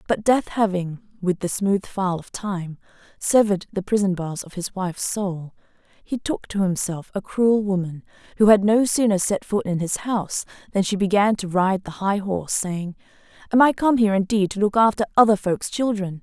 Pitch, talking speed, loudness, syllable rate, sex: 195 Hz, 195 wpm, -21 LUFS, 5.0 syllables/s, female